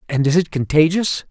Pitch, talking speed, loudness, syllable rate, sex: 155 Hz, 185 wpm, -17 LUFS, 5.4 syllables/s, male